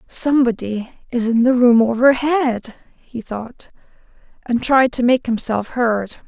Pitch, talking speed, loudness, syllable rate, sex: 240 Hz, 135 wpm, -17 LUFS, 4.0 syllables/s, female